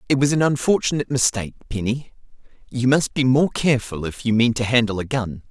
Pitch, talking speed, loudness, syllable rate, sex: 125 Hz, 195 wpm, -20 LUFS, 6.1 syllables/s, male